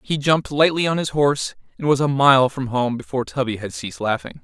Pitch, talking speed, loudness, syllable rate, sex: 135 Hz, 230 wpm, -20 LUFS, 6.1 syllables/s, male